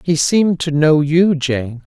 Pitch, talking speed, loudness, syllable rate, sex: 160 Hz, 185 wpm, -15 LUFS, 4.0 syllables/s, male